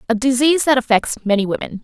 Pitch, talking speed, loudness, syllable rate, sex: 240 Hz, 195 wpm, -16 LUFS, 6.7 syllables/s, female